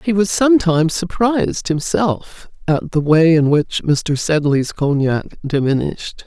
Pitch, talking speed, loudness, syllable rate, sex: 165 Hz, 135 wpm, -16 LUFS, 4.2 syllables/s, female